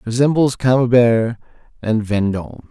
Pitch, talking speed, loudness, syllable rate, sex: 120 Hz, 90 wpm, -16 LUFS, 4.7 syllables/s, male